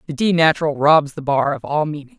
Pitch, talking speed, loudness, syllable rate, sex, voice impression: 150 Hz, 245 wpm, -17 LUFS, 5.9 syllables/s, female, very feminine, very adult-like, slightly thin, very tensed, very powerful, bright, hard, very clear, fluent, very cool, very intellectual, very refreshing, very sincere, calm, very friendly, very reassuring, very unique, elegant, very wild, slightly sweet, very lively, slightly kind, intense, slightly light